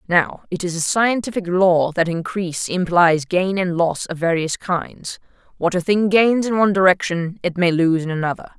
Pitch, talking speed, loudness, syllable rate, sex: 180 Hz, 190 wpm, -18 LUFS, 4.8 syllables/s, female